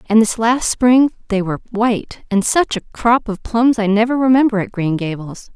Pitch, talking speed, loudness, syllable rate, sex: 220 Hz, 205 wpm, -16 LUFS, 5.0 syllables/s, female